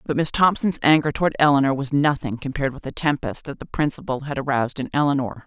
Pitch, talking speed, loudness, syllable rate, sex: 140 Hz, 210 wpm, -21 LUFS, 6.4 syllables/s, female